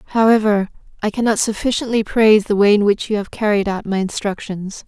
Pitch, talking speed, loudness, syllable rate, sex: 210 Hz, 185 wpm, -17 LUFS, 5.6 syllables/s, female